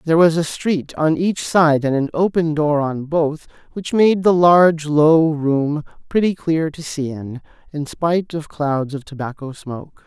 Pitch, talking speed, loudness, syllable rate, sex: 155 Hz, 185 wpm, -18 LUFS, 4.3 syllables/s, male